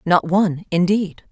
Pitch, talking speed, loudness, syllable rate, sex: 180 Hz, 135 wpm, -18 LUFS, 4.5 syllables/s, female